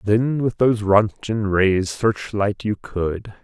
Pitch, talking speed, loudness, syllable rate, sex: 105 Hz, 140 wpm, -20 LUFS, 3.4 syllables/s, male